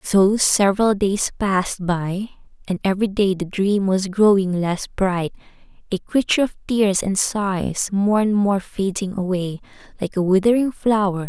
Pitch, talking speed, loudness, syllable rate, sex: 195 Hz, 155 wpm, -20 LUFS, 4.4 syllables/s, female